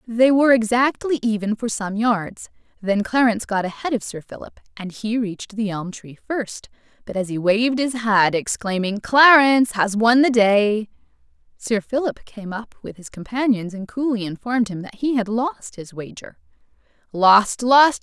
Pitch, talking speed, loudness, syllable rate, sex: 225 Hz, 170 wpm, -19 LUFS, 4.7 syllables/s, female